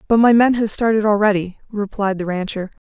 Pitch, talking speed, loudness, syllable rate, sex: 210 Hz, 190 wpm, -17 LUFS, 5.7 syllables/s, female